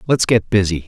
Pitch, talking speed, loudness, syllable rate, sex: 100 Hz, 205 wpm, -16 LUFS, 5.6 syllables/s, male